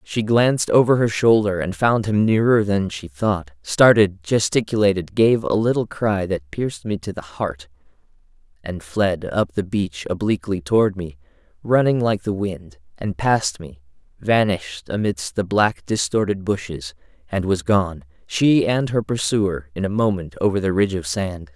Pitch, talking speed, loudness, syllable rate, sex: 95 Hz, 165 wpm, -20 LUFS, 4.7 syllables/s, male